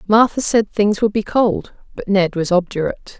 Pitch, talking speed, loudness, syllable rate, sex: 200 Hz, 190 wpm, -17 LUFS, 4.9 syllables/s, female